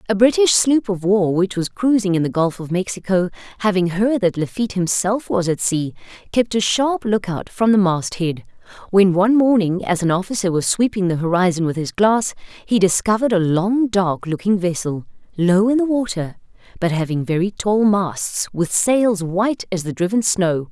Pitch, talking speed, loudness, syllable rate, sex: 195 Hz, 190 wpm, -18 LUFS, 5.0 syllables/s, female